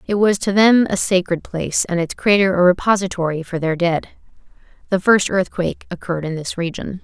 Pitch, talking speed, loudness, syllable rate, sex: 185 Hz, 190 wpm, -18 LUFS, 5.6 syllables/s, female